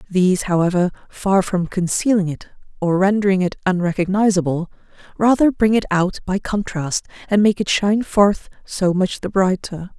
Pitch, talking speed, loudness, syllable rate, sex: 190 Hz, 150 wpm, -18 LUFS, 5.0 syllables/s, female